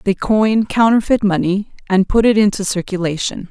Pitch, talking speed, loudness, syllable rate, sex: 205 Hz, 155 wpm, -15 LUFS, 5.0 syllables/s, female